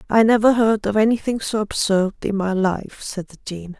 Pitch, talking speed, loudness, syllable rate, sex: 205 Hz, 205 wpm, -19 LUFS, 5.0 syllables/s, female